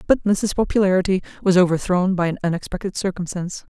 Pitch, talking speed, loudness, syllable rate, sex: 185 Hz, 145 wpm, -20 LUFS, 6.4 syllables/s, female